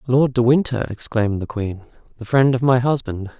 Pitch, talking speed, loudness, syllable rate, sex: 120 Hz, 195 wpm, -19 LUFS, 5.4 syllables/s, male